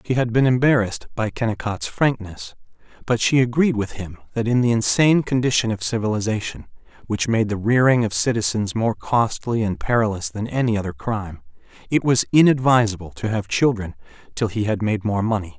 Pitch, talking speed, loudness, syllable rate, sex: 110 Hz, 175 wpm, -20 LUFS, 5.6 syllables/s, male